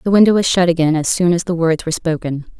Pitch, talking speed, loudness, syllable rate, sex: 170 Hz, 280 wpm, -15 LUFS, 6.6 syllables/s, female